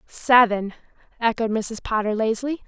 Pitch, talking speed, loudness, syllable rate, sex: 225 Hz, 110 wpm, -21 LUFS, 5.1 syllables/s, female